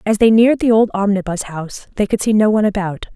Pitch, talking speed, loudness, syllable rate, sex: 205 Hz, 245 wpm, -15 LUFS, 6.7 syllables/s, female